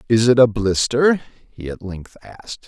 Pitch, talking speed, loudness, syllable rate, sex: 110 Hz, 180 wpm, -17 LUFS, 4.9 syllables/s, male